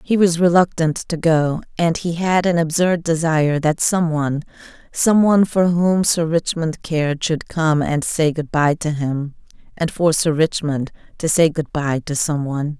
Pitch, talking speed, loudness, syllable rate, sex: 160 Hz, 175 wpm, -18 LUFS, 4.5 syllables/s, female